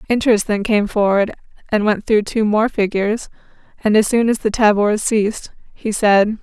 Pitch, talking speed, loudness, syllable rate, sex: 215 Hz, 175 wpm, -17 LUFS, 5.0 syllables/s, female